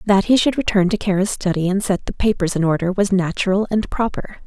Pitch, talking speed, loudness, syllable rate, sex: 195 Hz, 230 wpm, -19 LUFS, 5.8 syllables/s, female